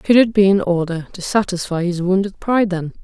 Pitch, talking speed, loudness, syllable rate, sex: 190 Hz, 215 wpm, -17 LUFS, 5.5 syllables/s, female